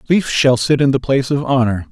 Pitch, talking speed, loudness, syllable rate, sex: 130 Hz, 250 wpm, -15 LUFS, 5.9 syllables/s, male